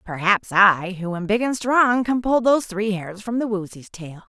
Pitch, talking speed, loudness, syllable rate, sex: 210 Hz, 235 wpm, -20 LUFS, 4.8 syllables/s, female